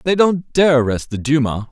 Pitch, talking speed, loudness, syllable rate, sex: 145 Hz, 210 wpm, -16 LUFS, 5.0 syllables/s, male